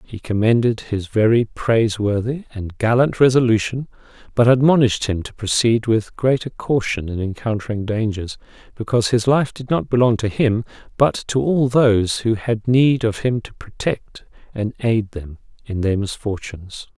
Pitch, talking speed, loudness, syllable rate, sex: 115 Hz, 155 wpm, -19 LUFS, 4.8 syllables/s, male